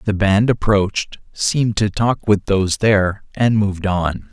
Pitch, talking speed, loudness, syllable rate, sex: 105 Hz, 165 wpm, -17 LUFS, 4.6 syllables/s, male